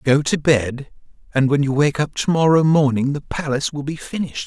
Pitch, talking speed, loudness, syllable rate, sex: 145 Hz, 215 wpm, -19 LUFS, 5.5 syllables/s, male